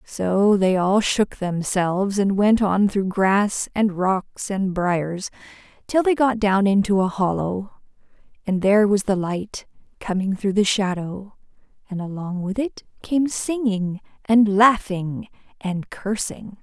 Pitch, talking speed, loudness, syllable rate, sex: 200 Hz, 145 wpm, -21 LUFS, 3.7 syllables/s, female